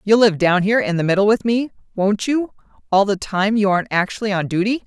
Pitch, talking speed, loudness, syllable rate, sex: 205 Hz, 235 wpm, -18 LUFS, 6.1 syllables/s, female